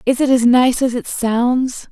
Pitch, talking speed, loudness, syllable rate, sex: 245 Hz, 220 wpm, -15 LUFS, 3.9 syllables/s, female